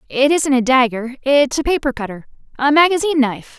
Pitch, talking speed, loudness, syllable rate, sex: 270 Hz, 150 wpm, -16 LUFS, 6.1 syllables/s, female